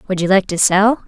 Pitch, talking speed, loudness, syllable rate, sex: 195 Hz, 280 wpm, -14 LUFS, 5.7 syllables/s, female